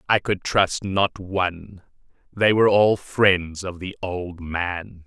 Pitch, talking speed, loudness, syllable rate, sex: 95 Hz, 155 wpm, -22 LUFS, 3.5 syllables/s, male